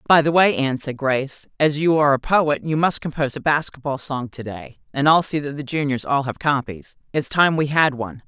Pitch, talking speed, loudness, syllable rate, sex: 145 Hz, 240 wpm, -20 LUFS, 5.6 syllables/s, female